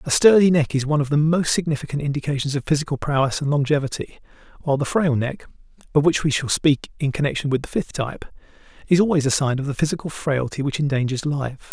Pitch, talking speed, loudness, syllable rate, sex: 145 Hz, 200 wpm, -21 LUFS, 6.5 syllables/s, male